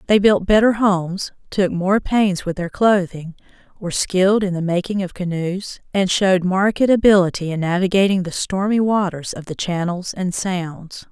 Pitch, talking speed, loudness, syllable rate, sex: 190 Hz, 165 wpm, -18 LUFS, 4.8 syllables/s, female